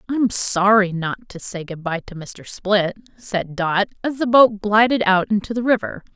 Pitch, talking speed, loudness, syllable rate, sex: 200 Hz, 195 wpm, -19 LUFS, 4.4 syllables/s, female